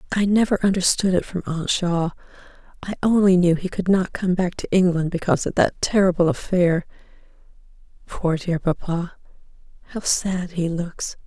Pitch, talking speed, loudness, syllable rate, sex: 180 Hz, 155 wpm, -21 LUFS, 4.9 syllables/s, female